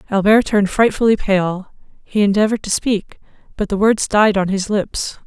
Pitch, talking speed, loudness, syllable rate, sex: 205 Hz, 170 wpm, -16 LUFS, 5.1 syllables/s, female